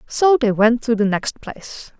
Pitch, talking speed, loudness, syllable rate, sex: 235 Hz, 210 wpm, -17 LUFS, 4.4 syllables/s, female